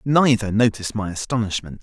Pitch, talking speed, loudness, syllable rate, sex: 110 Hz, 130 wpm, -20 LUFS, 5.8 syllables/s, male